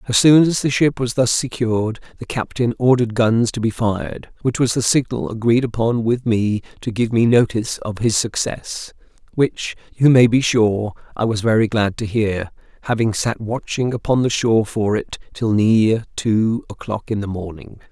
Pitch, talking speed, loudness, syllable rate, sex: 115 Hz, 190 wpm, -18 LUFS, 4.8 syllables/s, male